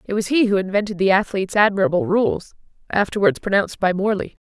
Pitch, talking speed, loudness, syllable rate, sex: 200 Hz, 175 wpm, -19 LUFS, 6.7 syllables/s, female